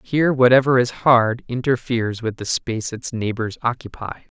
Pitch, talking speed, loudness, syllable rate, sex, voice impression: 120 Hz, 150 wpm, -19 LUFS, 5.1 syllables/s, male, masculine, adult-like, slightly relaxed, slightly bright, clear, fluent, cool, refreshing, calm, friendly, reassuring, slightly wild, kind, slightly modest